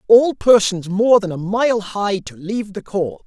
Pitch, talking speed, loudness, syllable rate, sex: 205 Hz, 200 wpm, -17 LUFS, 4.2 syllables/s, male